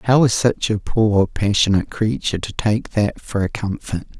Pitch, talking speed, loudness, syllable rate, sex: 105 Hz, 185 wpm, -19 LUFS, 4.8 syllables/s, male